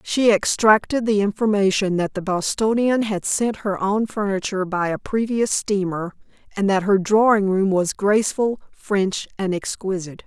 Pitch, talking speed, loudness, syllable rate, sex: 200 Hz, 150 wpm, -20 LUFS, 4.6 syllables/s, female